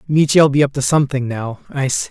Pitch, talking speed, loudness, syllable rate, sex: 135 Hz, 200 wpm, -16 LUFS, 5.9 syllables/s, male